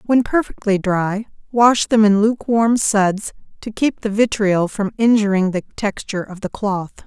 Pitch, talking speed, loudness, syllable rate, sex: 210 Hz, 160 wpm, -18 LUFS, 4.6 syllables/s, female